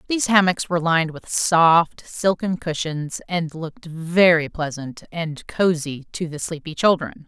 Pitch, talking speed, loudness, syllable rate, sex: 165 Hz, 150 wpm, -21 LUFS, 4.3 syllables/s, female